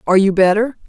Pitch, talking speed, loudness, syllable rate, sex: 205 Hz, 205 wpm, -14 LUFS, 7.6 syllables/s, female